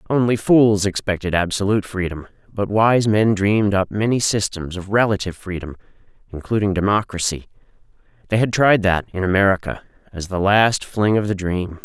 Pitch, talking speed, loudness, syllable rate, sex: 100 Hz, 150 wpm, -19 LUFS, 5.4 syllables/s, male